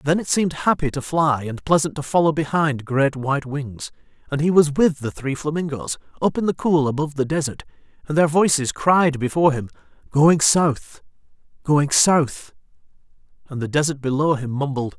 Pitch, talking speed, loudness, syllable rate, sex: 145 Hz, 185 wpm, -20 LUFS, 5.3 syllables/s, male